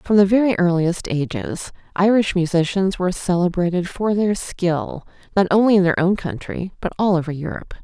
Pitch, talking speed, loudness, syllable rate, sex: 185 Hz, 170 wpm, -19 LUFS, 5.3 syllables/s, female